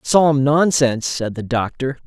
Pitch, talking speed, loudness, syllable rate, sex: 135 Hz, 145 wpm, -18 LUFS, 4.7 syllables/s, male